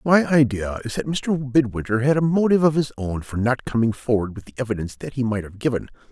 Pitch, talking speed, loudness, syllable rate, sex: 125 Hz, 235 wpm, -22 LUFS, 6.2 syllables/s, male